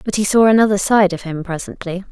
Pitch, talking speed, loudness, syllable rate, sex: 195 Hz, 225 wpm, -16 LUFS, 6.1 syllables/s, female